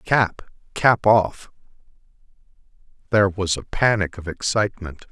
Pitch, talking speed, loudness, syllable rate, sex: 100 Hz, 105 wpm, -20 LUFS, 4.4 syllables/s, male